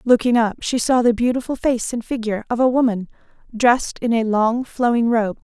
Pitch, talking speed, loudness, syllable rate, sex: 235 Hz, 195 wpm, -19 LUFS, 5.4 syllables/s, female